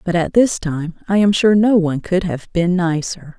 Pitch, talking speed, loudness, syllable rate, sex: 180 Hz, 230 wpm, -17 LUFS, 4.8 syllables/s, female